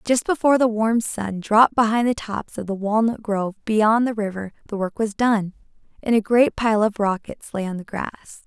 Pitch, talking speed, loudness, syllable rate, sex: 215 Hz, 215 wpm, -21 LUFS, 5.2 syllables/s, female